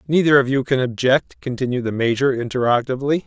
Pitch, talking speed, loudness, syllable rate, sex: 130 Hz, 165 wpm, -19 LUFS, 6.5 syllables/s, male